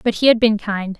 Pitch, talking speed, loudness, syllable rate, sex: 215 Hz, 300 wpm, -17 LUFS, 5.6 syllables/s, female